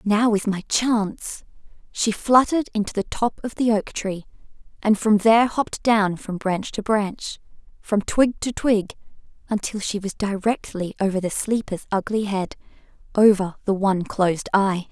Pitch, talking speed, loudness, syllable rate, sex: 205 Hz, 160 wpm, -22 LUFS, 4.6 syllables/s, female